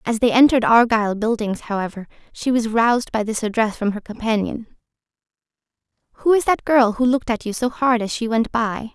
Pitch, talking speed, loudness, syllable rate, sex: 230 Hz, 195 wpm, -19 LUFS, 5.8 syllables/s, female